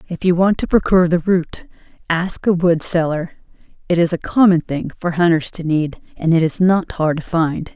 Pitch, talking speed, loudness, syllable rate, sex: 170 Hz, 210 wpm, -17 LUFS, 5.0 syllables/s, female